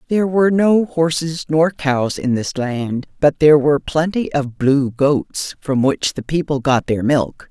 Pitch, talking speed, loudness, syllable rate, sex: 145 Hz, 185 wpm, -17 LUFS, 4.2 syllables/s, female